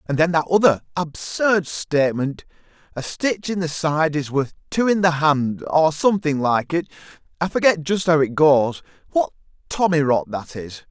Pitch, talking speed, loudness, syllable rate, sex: 160 Hz, 160 wpm, -20 LUFS, 4.6 syllables/s, male